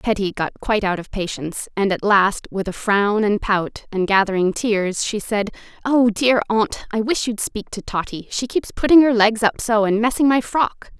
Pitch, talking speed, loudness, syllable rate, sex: 210 Hz, 215 wpm, -19 LUFS, 4.8 syllables/s, female